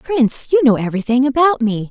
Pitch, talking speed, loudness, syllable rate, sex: 260 Hz, 190 wpm, -15 LUFS, 6.1 syllables/s, female